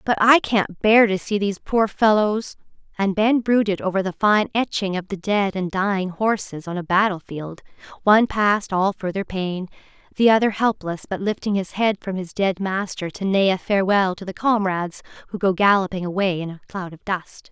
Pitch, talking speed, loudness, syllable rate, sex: 195 Hz, 200 wpm, -21 LUFS, 5.1 syllables/s, female